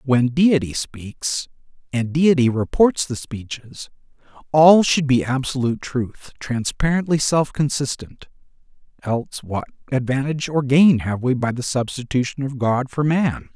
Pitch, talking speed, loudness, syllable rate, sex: 135 Hz, 135 wpm, -20 LUFS, 4.3 syllables/s, male